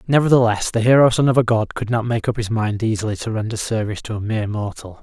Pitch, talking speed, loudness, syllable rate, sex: 115 Hz, 250 wpm, -19 LUFS, 6.5 syllables/s, male